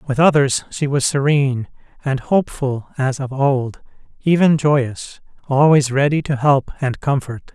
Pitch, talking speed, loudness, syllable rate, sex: 140 Hz, 145 wpm, -17 LUFS, 4.4 syllables/s, male